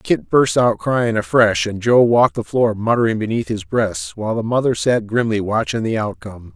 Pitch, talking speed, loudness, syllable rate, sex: 115 Hz, 200 wpm, -17 LUFS, 5.1 syllables/s, male